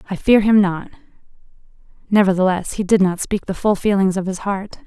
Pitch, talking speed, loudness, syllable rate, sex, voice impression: 195 Hz, 185 wpm, -17 LUFS, 5.6 syllables/s, female, feminine, adult-like, soft, intellectual, slightly elegant